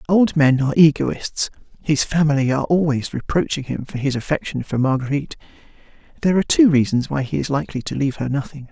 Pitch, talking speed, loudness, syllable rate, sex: 145 Hz, 185 wpm, -19 LUFS, 6.5 syllables/s, male